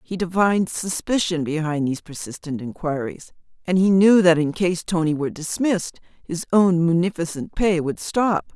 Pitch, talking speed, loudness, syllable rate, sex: 175 Hz, 155 wpm, -21 LUFS, 5.0 syllables/s, female